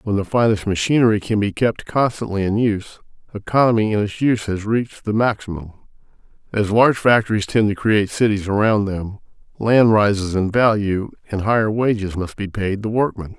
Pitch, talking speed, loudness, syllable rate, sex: 105 Hz, 175 wpm, -18 LUFS, 5.5 syllables/s, male